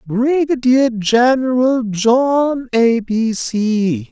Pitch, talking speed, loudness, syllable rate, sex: 240 Hz, 90 wpm, -15 LUFS, 2.6 syllables/s, male